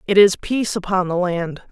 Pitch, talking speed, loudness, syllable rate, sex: 190 Hz, 210 wpm, -19 LUFS, 5.4 syllables/s, female